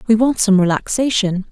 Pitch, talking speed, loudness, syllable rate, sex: 210 Hz, 160 wpm, -15 LUFS, 5.2 syllables/s, female